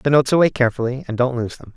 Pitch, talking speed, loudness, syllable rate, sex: 125 Hz, 305 wpm, -19 LUFS, 8.3 syllables/s, male